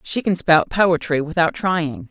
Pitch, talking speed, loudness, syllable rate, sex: 165 Hz, 170 wpm, -18 LUFS, 4.0 syllables/s, female